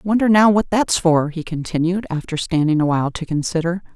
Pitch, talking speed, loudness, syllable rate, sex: 175 Hz, 180 wpm, -18 LUFS, 5.6 syllables/s, female